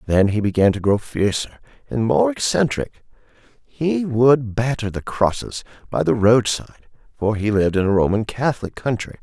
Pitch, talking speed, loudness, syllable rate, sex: 110 Hz, 165 wpm, -19 LUFS, 5.0 syllables/s, male